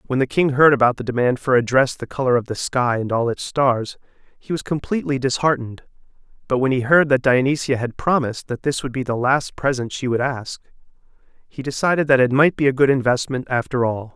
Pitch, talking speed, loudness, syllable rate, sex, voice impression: 130 Hz, 220 wpm, -19 LUFS, 5.9 syllables/s, male, masculine, adult-like, bright, clear, fluent, cool, refreshing, friendly, reassuring, lively, kind